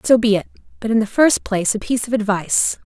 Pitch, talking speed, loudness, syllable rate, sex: 220 Hz, 245 wpm, -18 LUFS, 6.7 syllables/s, female